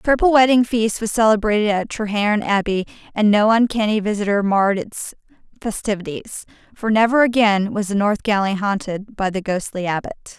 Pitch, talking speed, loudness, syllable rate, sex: 210 Hz, 160 wpm, -18 LUFS, 5.5 syllables/s, female